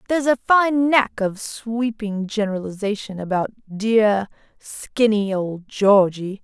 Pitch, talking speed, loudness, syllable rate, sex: 215 Hz, 140 wpm, -20 LUFS, 4.4 syllables/s, female